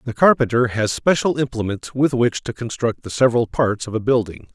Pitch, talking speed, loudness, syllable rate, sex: 120 Hz, 200 wpm, -19 LUFS, 5.5 syllables/s, male